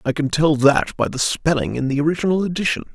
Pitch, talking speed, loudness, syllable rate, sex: 150 Hz, 225 wpm, -19 LUFS, 6.2 syllables/s, male